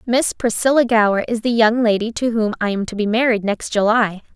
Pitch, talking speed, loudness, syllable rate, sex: 225 Hz, 220 wpm, -17 LUFS, 5.5 syllables/s, female